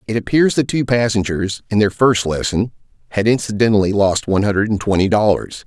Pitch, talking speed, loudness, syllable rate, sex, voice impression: 105 Hz, 180 wpm, -16 LUFS, 5.8 syllables/s, male, masculine, middle-aged, thick, tensed, powerful, cool, intellectual, friendly, reassuring, wild, lively, kind